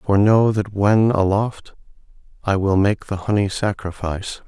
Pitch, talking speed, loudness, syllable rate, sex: 100 Hz, 145 wpm, -19 LUFS, 4.4 syllables/s, male